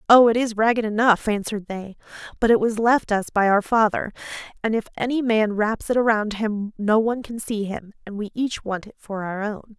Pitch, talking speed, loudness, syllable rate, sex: 215 Hz, 220 wpm, -22 LUFS, 5.2 syllables/s, female